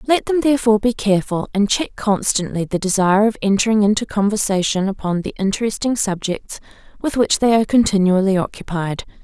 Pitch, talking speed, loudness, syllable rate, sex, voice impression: 210 Hz, 155 wpm, -18 LUFS, 6.0 syllables/s, female, feminine, adult-like, slightly tensed, bright, soft, clear, fluent, slightly refreshing, calm, friendly, reassuring, elegant, slightly lively, kind